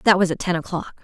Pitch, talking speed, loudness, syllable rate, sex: 175 Hz, 290 wpm, -21 LUFS, 6.5 syllables/s, female